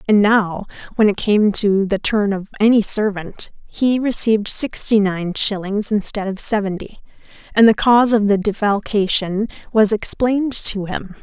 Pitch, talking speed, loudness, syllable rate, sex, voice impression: 210 Hz, 155 wpm, -17 LUFS, 4.5 syllables/s, female, feminine, adult-like, tensed, bright, soft, clear, slightly raspy, intellectual, friendly, reassuring, lively, kind